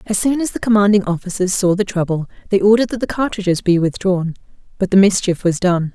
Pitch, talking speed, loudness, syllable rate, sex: 195 Hz, 200 wpm, -16 LUFS, 6.2 syllables/s, female